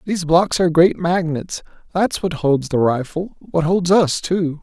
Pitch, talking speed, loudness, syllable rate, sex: 170 Hz, 170 wpm, -18 LUFS, 4.4 syllables/s, male